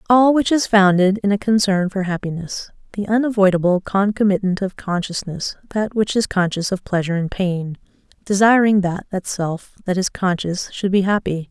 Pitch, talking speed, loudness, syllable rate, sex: 195 Hz, 165 wpm, -19 LUFS, 5.1 syllables/s, female